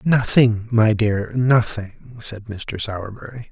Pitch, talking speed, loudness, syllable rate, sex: 110 Hz, 120 wpm, -20 LUFS, 3.6 syllables/s, male